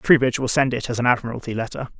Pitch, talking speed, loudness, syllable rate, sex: 120 Hz, 240 wpm, -21 LUFS, 7.5 syllables/s, male